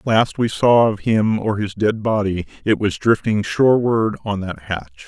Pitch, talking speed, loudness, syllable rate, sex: 105 Hz, 200 wpm, -18 LUFS, 4.6 syllables/s, male